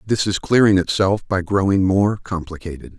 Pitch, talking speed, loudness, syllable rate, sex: 95 Hz, 160 wpm, -18 LUFS, 4.9 syllables/s, male